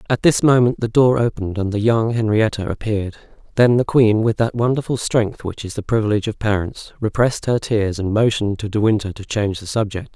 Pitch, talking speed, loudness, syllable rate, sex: 110 Hz, 215 wpm, -18 LUFS, 5.9 syllables/s, male